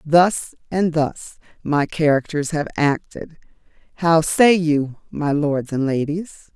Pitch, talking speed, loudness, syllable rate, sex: 155 Hz, 130 wpm, -19 LUFS, 3.6 syllables/s, female